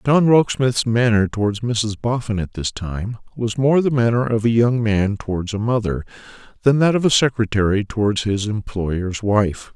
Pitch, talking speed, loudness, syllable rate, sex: 110 Hz, 180 wpm, -19 LUFS, 4.8 syllables/s, male